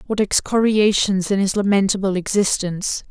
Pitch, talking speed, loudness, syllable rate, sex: 200 Hz, 115 wpm, -18 LUFS, 5.2 syllables/s, female